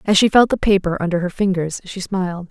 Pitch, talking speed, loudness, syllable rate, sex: 190 Hz, 240 wpm, -18 LUFS, 5.9 syllables/s, female